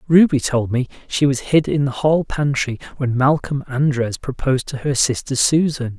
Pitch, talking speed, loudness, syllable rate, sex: 135 Hz, 180 wpm, -19 LUFS, 4.8 syllables/s, male